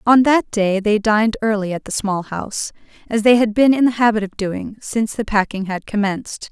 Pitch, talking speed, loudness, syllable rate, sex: 215 Hz, 220 wpm, -18 LUFS, 5.4 syllables/s, female